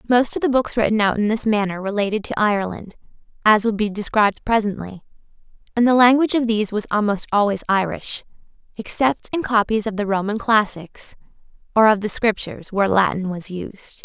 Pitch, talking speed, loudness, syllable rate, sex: 210 Hz, 175 wpm, -19 LUFS, 5.8 syllables/s, female